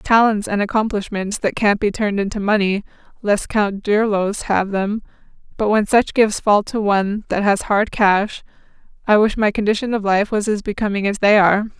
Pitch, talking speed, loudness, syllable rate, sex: 205 Hz, 190 wpm, -18 LUFS, 5.1 syllables/s, female